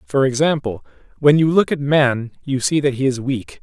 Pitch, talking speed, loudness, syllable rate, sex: 135 Hz, 215 wpm, -18 LUFS, 4.9 syllables/s, male